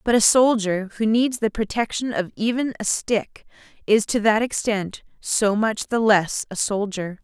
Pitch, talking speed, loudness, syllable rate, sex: 215 Hz, 175 wpm, -21 LUFS, 4.3 syllables/s, female